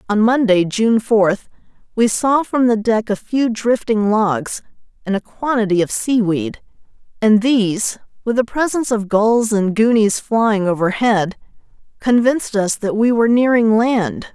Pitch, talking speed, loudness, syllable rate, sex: 220 Hz, 150 wpm, -16 LUFS, 4.3 syllables/s, female